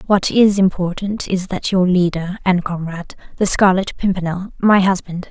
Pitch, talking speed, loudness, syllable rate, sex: 185 Hz, 160 wpm, -17 LUFS, 4.8 syllables/s, female